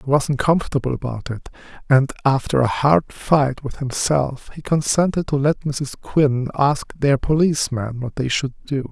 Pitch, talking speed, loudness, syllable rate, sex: 140 Hz, 175 wpm, -20 LUFS, 4.6 syllables/s, male